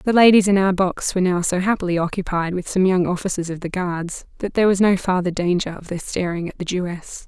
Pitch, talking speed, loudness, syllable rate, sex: 185 Hz, 240 wpm, -20 LUFS, 5.9 syllables/s, female